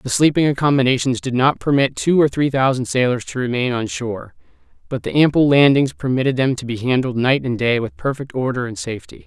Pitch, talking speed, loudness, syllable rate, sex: 130 Hz, 205 wpm, -18 LUFS, 5.9 syllables/s, male